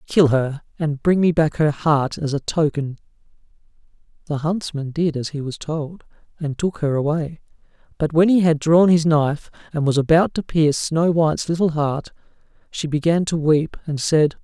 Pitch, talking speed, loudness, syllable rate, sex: 155 Hz, 185 wpm, -20 LUFS, 4.8 syllables/s, male